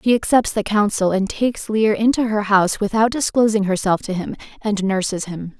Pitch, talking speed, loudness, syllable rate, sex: 210 Hz, 195 wpm, -19 LUFS, 5.4 syllables/s, female